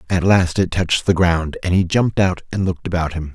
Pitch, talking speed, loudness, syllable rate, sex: 90 Hz, 250 wpm, -18 LUFS, 5.8 syllables/s, male